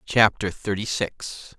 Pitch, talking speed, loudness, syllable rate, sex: 100 Hz, 115 wpm, -24 LUFS, 3.4 syllables/s, male